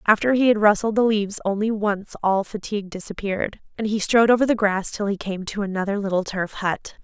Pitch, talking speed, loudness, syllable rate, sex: 205 Hz, 215 wpm, -22 LUFS, 5.9 syllables/s, female